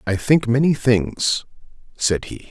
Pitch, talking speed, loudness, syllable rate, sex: 120 Hz, 145 wpm, -19 LUFS, 3.7 syllables/s, male